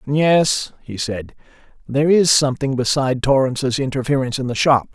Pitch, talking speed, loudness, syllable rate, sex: 135 Hz, 145 wpm, -18 LUFS, 5.6 syllables/s, male